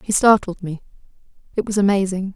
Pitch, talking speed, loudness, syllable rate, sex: 195 Hz, 155 wpm, -19 LUFS, 5.9 syllables/s, female